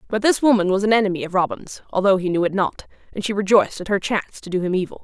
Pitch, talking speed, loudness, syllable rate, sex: 195 Hz, 275 wpm, -20 LUFS, 7.2 syllables/s, female